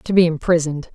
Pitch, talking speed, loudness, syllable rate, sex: 165 Hz, 190 wpm, -18 LUFS, 6.6 syllables/s, female